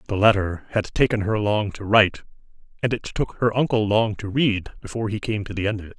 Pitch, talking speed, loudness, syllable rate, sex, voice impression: 105 Hz, 240 wpm, -22 LUFS, 6.1 syllables/s, male, masculine, very adult-like, middle-aged, very thick, slightly tensed, powerful, bright, slightly hard, muffled, very fluent, cool, very intellectual, slightly refreshing, very sincere, very calm, very mature, very friendly, very reassuring, unique, elegant, slightly sweet, lively, very kind